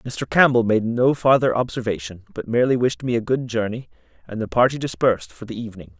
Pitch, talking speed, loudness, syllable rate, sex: 120 Hz, 200 wpm, -20 LUFS, 6.0 syllables/s, male